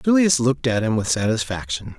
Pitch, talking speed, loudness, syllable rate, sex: 125 Hz, 180 wpm, -20 LUFS, 5.6 syllables/s, male